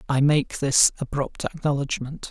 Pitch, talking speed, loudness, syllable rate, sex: 140 Hz, 130 wpm, -23 LUFS, 4.4 syllables/s, male